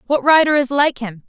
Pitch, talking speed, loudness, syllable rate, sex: 265 Hz, 235 wpm, -15 LUFS, 5.4 syllables/s, female